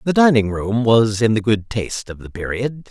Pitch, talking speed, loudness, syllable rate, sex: 115 Hz, 225 wpm, -18 LUFS, 5.0 syllables/s, male